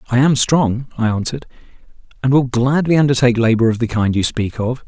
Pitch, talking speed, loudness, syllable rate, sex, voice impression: 125 Hz, 195 wpm, -16 LUFS, 6.1 syllables/s, male, masculine, adult-like, slightly muffled, fluent, cool, sincere, slightly calm